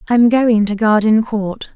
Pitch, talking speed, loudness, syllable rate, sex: 220 Hz, 135 wpm, -14 LUFS, 3.8 syllables/s, female